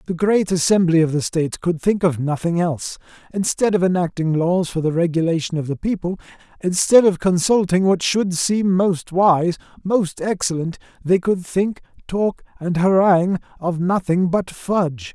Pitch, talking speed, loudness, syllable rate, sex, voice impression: 175 Hz, 160 wpm, -19 LUFS, 4.7 syllables/s, male, very masculine, very adult-like, slightly old, very thick, tensed, powerful, bright, slightly hard, clear, fluent, slightly raspy, very cool, very intellectual, sincere, very calm, very mature, very friendly, reassuring, unique, very wild, very lively, strict, intense